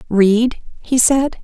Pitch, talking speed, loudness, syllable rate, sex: 235 Hz, 125 wpm, -15 LUFS, 2.9 syllables/s, female